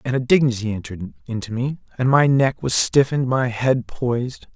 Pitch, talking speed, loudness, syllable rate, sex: 125 Hz, 185 wpm, -20 LUFS, 5.4 syllables/s, male